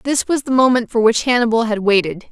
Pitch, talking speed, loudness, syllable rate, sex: 235 Hz, 235 wpm, -16 LUFS, 5.9 syllables/s, female